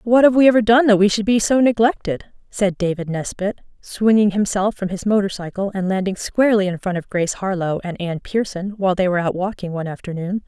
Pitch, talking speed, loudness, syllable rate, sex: 200 Hz, 210 wpm, -19 LUFS, 6.1 syllables/s, female